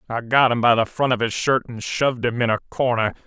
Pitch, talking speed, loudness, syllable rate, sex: 120 Hz, 275 wpm, -20 LUFS, 6.1 syllables/s, male